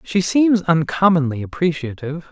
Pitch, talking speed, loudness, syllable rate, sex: 165 Hz, 105 wpm, -18 LUFS, 5.0 syllables/s, male